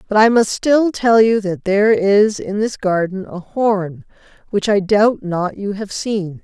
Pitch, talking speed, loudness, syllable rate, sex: 205 Hz, 195 wpm, -16 LUFS, 4.0 syllables/s, female